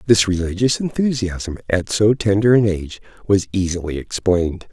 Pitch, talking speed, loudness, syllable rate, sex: 100 Hz, 140 wpm, -18 LUFS, 5.1 syllables/s, male